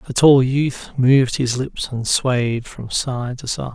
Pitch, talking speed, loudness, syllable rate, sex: 125 Hz, 190 wpm, -18 LUFS, 3.7 syllables/s, male